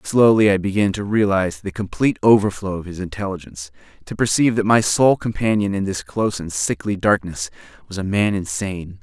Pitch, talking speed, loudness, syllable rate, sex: 95 Hz, 180 wpm, -19 LUFS, 5.9 syllables/s, male